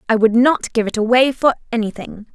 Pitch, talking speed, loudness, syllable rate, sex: 235 Hz, 205 wpm, -16 LUFS, 5.6 syllables/s, female